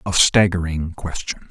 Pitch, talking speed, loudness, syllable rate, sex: 85 Hz, 120 wpm, -19 LUFS, 4.4 syllables/s, male